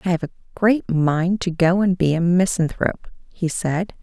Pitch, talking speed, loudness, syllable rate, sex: 175 Hz, 195 wpm, -20 LUFS, 4.9 syllables/s, female